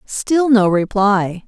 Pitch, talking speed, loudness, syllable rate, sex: 215 Hz, 120 wpm, -15 LUFS, 2.9 syllables/s, female